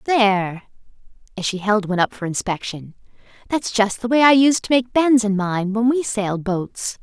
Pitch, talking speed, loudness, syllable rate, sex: 215 Hz, 195 wpm, -19 LUFS, 5.0 syllables/s, female